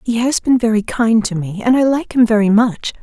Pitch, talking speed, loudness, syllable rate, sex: 225 Hz, 260 wpm, -15 LUFS, 5.3 syllables/s, female